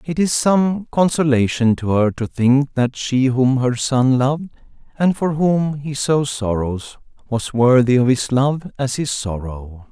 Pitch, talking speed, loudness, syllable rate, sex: 135 Hz, 170 wpm, -18 LUFS, 4.0 syllables/s, male